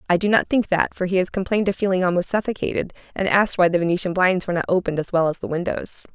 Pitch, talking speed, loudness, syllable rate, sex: 185 Hz, 265 wpm, -21 LUFS, 7.3 syllables/s, female